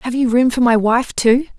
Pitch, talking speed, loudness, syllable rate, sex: 245 Hz, 265 wpm, -15 LUFS, 5.1 syllables/s, female